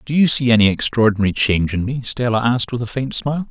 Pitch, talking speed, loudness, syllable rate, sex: 120 Hz, 240 wpm, -17 LUFS, 6.7 syllables/s, male